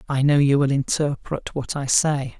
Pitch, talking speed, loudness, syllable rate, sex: 140 Hz, 200 wpm, -21 LUFS, 4.6 syllables/s, male